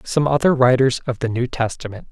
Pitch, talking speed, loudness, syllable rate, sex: 130 Hz, 200 wpm, -18 LUFS, 5.6 syllables/s, male